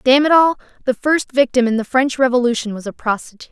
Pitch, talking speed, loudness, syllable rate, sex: 255 Hz, 220 wpm, -16 LUFS, 6.5 syllables/s, female